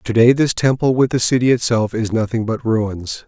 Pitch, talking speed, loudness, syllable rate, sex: 115 Hz, 200 wpm, -17 LUFS, 5.1 syllables/s, male